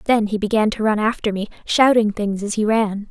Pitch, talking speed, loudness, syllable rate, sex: 215 Hz, 230 wpm, -19 LUFS, 5.4 syllables/s, female